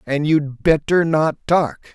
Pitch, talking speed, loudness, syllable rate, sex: 150 Hz, 155 wpm, -18 LUFS, 3.7 syllables/s, male